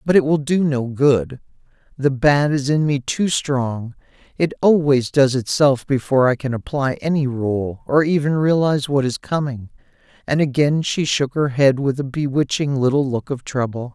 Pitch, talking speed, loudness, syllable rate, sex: 140 Hz, 180 wpm, -19 LUFS, 4.7 syllables/s, male